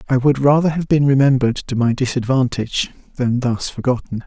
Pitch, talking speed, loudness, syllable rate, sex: 130 Hz, 170 wpm, -17 LUFS, 5.8 syllables/s, male